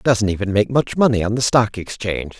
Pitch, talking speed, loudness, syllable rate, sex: 110 Hz, 250 wpm, -18 LUFS, 6.2 syllables/s, male